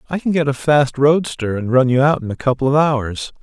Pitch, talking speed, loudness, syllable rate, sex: 135 Hz, 265 wpm, -16 LUFS, 5.4 syllables/s, male